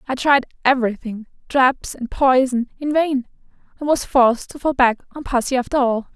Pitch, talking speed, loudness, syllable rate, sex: 260 Hz, 175 wpm, -19 LUFS, 5.2 syllables/s, female